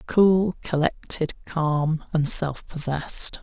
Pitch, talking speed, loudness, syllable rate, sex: 160 Hz, 105 wpm, -23 LUFS, 3.2 syllables/s, male